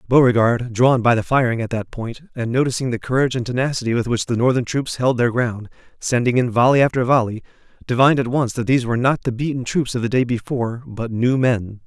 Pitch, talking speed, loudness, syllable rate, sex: 125 Hz, 220 wpm, -19 LUFS, 6.1 syllables/s, male